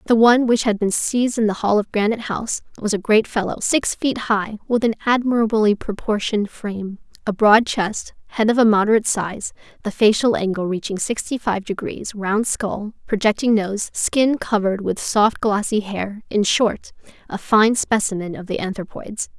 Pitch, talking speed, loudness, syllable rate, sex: 215 Hz, 175 wpm, -19 LUFS, 5.0 syllables/s, female